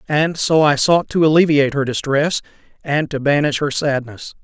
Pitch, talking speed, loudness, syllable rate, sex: 145 Hz, 175 wpm, -16 LUFS, 5.0 syllables/s, male